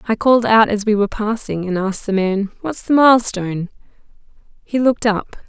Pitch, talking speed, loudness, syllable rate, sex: 215 Hz, 195 wpm, -17 LUFS, 5.7 syllables/s, female